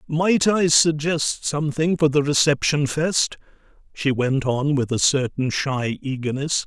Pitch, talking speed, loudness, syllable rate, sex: 145 Hz, 145 wpm, -20 LUFS, 4.1 syllables/s, male